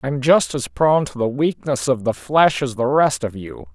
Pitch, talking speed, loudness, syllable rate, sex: 130 Hz, 240 wpm, -18 LUFS, 4.7 syllables/s, male